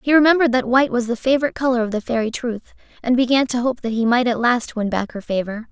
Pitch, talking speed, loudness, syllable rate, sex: 240 Hz, 260 wpm, -19 LUFS, 6.7 syllables/s, female